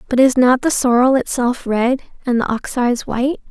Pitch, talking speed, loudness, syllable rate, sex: 250 Hz, 190 wpm, -16 LUFS, 5.1 syllables/s, female